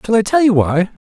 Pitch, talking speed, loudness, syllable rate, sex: 180 Hz, 280 wpm, -14 LUFS, 5.6 syllables/s, male